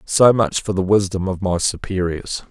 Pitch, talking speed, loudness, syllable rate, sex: 95 Hz, 190 wpm, -19 LUFS, 4.6 syllables/s, male